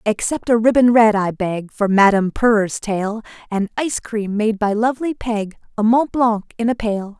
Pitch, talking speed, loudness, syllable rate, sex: 220 Hz, 190 wpm, -18 LUFS, 4.7 syllables/s, female